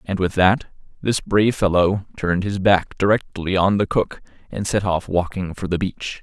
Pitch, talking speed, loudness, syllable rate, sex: 95 Hz, 195 wpm, -20 LUFS, 4.7 syllables/s, male